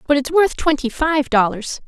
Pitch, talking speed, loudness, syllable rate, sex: 280 Hz, 190 wpm, -18 LUFS, 4.7 syllables/s, female